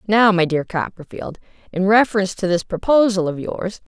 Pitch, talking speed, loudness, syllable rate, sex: 195 Hz, 165 wpm, -18 LUFS, 5.4 syllables/s, female